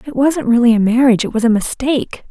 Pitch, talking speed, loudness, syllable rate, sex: 245 Hz, 235 wpm, -14 LUFS, 6.5 syllables/s, female